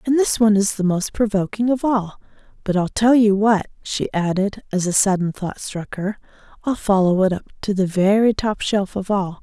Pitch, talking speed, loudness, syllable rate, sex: 205 Hz, 205 wpm, -19 LUFS, 4.9 syllables/s, female